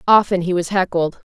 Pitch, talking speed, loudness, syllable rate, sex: 185 Hz, 185 wpm, -18 LUFS, 5.4 syllables/s, female